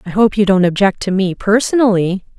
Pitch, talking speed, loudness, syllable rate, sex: 200 Hz, 200 wpm, -14 LUFS, 5.6 syllables/s, female